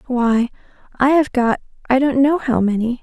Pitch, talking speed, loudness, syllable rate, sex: 255 Hz, 180 wpm, -17 LUFS, 4.7 syllables/s, female